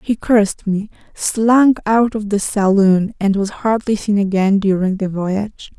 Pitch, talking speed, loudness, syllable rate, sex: 205 Hz, 165 wpm, -16 LUFS, 4.2 syllables/s, female